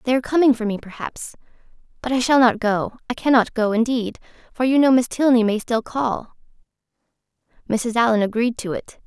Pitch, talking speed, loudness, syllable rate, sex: 240 Hz, 170 wpm, -20 LUFS, 5.6 syllables/s, female